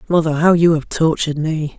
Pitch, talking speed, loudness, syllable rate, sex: 160 Hz, 200 wpm, -16 LUFS, 5.5 syllables/s, female